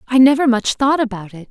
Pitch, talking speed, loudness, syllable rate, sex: 245 Hz, 240 wpm, -15 LUFS, 5.9 syllables/s, female